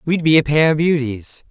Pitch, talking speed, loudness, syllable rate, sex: 150 Hz, 240 wpm, -16 LUFS, 5.2 syllables/s, male